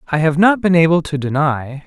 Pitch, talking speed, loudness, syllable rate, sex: 160 Hz, 225 wpm, -15 LUFS, 5.6 syllables/s, male